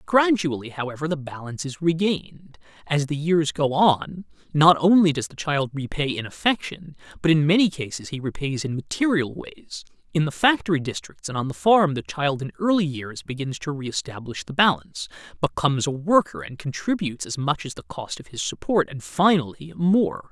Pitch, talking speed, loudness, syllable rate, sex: 155 Hz, 185 wpm, -23 LUFS, 5.2 syllables/s, male